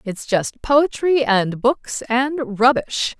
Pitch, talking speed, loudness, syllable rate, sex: 245 Hz, 130 wpm, -19 LUFS, 3.0 syllables/s, female